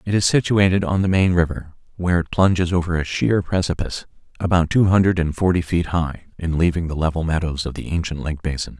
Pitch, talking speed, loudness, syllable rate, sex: 85 Hz, 210 wpm, -20 LUFS, 6.0 syllables/s, male